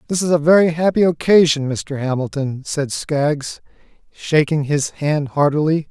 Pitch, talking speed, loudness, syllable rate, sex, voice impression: 150 Hz, 140 wpm, -17 LUFS, 4.4 syllables/s, male, masculine, adult-like, slightly thick, slightly soft, calm, friendly, slightly sweet, kind